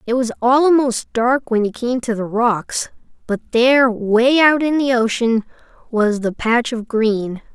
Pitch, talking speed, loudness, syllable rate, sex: 235 Hz, 175 wpm, -17 LUFS, 4.0 syllables/s, female